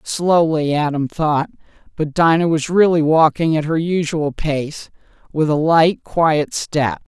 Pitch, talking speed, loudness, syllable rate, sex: 155 Hz, 145 wpm, -17 LUFS, 3.8 syllables/s, female